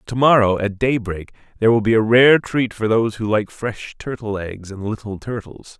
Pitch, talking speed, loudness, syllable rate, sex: 110 Hz, 195 wpm, -18 LUFS, 5.1 syllables/s, male